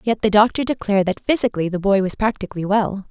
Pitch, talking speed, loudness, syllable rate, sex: 205 Hz, 215 wpm, -19 LUFS, 6.7 syllables/s, female